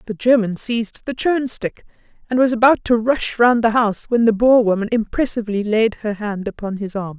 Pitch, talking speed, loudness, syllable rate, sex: 225 Hz, 210 wpm, -18 LUFS, 5.3 syllables/s, female